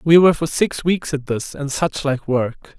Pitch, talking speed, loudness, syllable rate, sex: 150 Hz, 235 wpm, -19 LUFS, 4.5 syllables/s, male